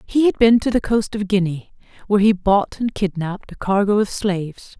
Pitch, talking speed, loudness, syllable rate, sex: 205 Hz, 215 wpm, -19 LUFS, 5.4 syllables/s, female